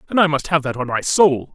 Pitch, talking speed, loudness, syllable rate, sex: 150 Hz, 310 wpm, -17 LUFS, 5.9 syllables/s, male